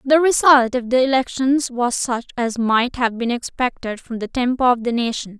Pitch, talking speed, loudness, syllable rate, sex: 245 Hz, 200 wpm, -18 LUFS, 4.8 syllables/s, female